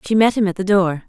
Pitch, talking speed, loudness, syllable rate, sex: 195 Hz, 335 wpm, -17 LUFS, 6.7 syllables/s, female